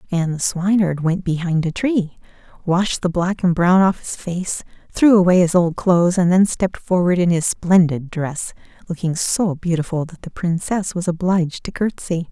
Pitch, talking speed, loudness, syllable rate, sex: 175 Hz, 185 wpm, -18 LUFS, 4.9 syllables/s, female